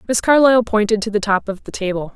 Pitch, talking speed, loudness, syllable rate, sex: 215 Hz, 250 wpm, -16 LUFS, 6.5 syllables/s, female